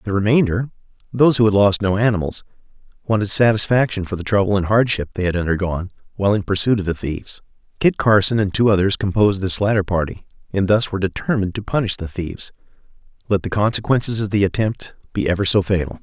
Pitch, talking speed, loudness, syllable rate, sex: 100 Hz, 190 wpm, -18 LUFS, 6.7 syllables/s, male